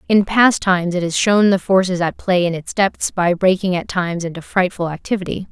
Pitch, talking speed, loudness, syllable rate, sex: 185 Hz, 220 wpm, -17 LUFS, 5.5 syllables/s, female